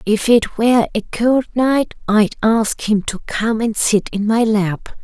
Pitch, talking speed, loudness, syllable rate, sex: 220 Hz, 190 wpm, -16 LUFS, 3.8 syllables/s, female